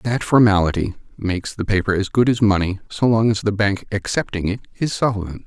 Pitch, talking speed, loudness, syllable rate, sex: 105 Hz, 200 wpm, -19 LUFS, 5.5 syllables/s, male